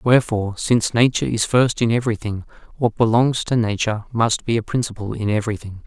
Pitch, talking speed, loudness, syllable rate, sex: 115 Hz, 175 wpm, -20 LUFS, 6.4 syllables/s, male